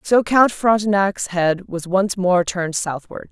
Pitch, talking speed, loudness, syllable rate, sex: 190 Hz, 165 wpm, -18 LUFS, 4.1 syllables/s, female